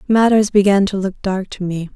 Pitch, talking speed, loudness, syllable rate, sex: 195 Hz, 215 wpm, -16 LUFS, 5.4 syllables/s, female